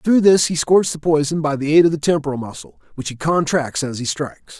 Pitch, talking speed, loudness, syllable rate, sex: 150 Hz, 250 wpm, -18 LUFS, 5.7 syllables/s, male